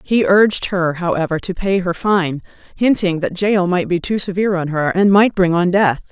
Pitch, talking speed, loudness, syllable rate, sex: 180 Hz, 215 wpm, -16 LUFS, 5.0 syllables/s, female